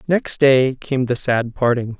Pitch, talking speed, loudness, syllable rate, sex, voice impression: 130 Hz, 180 wpm, -18 LUFS, 3.8 syllables/s, male, masculine, adult-like, slightly refreshing, sincere, slightly kind